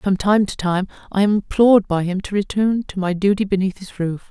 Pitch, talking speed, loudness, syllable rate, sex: 195 Hz, 235 wpm, -19 LUFS, 5.5 syllables/s, female